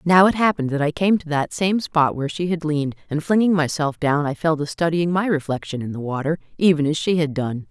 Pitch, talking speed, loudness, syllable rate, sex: 160 Hz, 250 wpm, -21 LUFS, 5.9 syllables/s, female